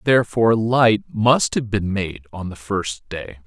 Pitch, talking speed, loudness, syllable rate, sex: 105 Hz, 175 wpm, -19 LUFS, 4.2 syllables/s, male